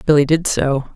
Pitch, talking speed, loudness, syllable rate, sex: 145 Hz, 190 wpm, -16 LUFS, 4.9 syllables/s, female